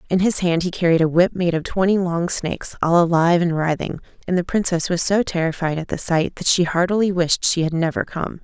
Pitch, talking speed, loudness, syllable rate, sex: 175 Hz, 235 wpm, -19 LUFS, 5.7 syllables/s, female